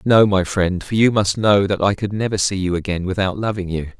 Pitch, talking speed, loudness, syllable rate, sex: 100 Hz, 255 wpm, -18 LUFS, 5.5 syllables/s, male